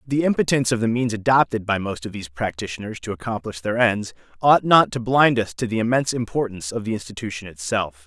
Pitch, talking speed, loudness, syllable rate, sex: 110 Hz, 210 wpm, -21 LUFS, 6.3 syllables/s, male